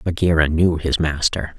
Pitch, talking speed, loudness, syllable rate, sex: 80 Hz, 150 wpm, -18 LUFS, 4.7 syllables/s, male